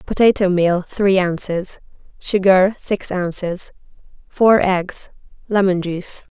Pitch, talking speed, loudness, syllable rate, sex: 190 Hz, 105 wpm, -17 LUFS, 3.7 syllables/s, female